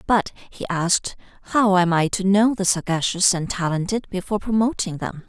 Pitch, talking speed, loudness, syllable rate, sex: 190 Hz, 170 wpm, -21 LUFS, 5.3 syllables/s, female